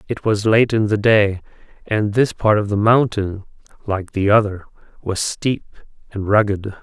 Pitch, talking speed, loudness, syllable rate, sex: 105 Hz, 165 wpm, -18 LUFS, 4.5 syllables/s, male